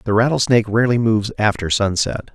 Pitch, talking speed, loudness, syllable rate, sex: 110 Hz, 155 wpm, -17 LUFS, 6.4 syllables/s, male